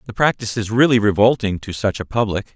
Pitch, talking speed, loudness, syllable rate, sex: 110 Hz, 210 wpm, -18 LUFS, 6.3 syllables/s, male